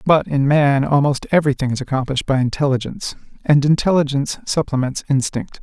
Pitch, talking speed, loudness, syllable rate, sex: 140 Hz, 150 wpm, -18 LUFS, 6.1 syllables/s, male